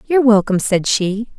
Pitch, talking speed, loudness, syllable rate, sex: 220 Hz, 175 wpm, -15 LUFS, 5.7 syllables/s, female